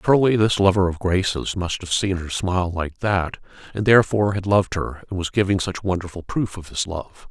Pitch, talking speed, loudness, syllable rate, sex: 95 Hz, 215 wpm, -21 LUFS, 5.6 syllables/s, male